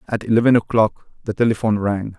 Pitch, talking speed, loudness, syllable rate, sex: 110 Hz, 165 wpm, -18 LUFS, 6.4 syllables/s, male